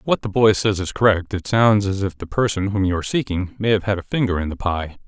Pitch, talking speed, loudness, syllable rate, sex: 100 Hz, 295 wpm, -20 LUFS, 6.1 syllables/s, male